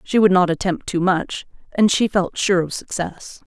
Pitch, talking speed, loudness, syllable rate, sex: 185 Hz, 205 wpm, -19 LUFS, 4.6 syllables/s, female